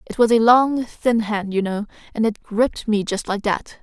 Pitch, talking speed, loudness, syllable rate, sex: 220 Hz, 235 wpm, -20 LUFS, 4.7 syllables/s, female